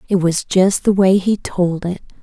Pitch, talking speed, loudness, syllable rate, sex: 185 Hz, 215 wpm, -16 LUFS, 4.3 syllables/s, female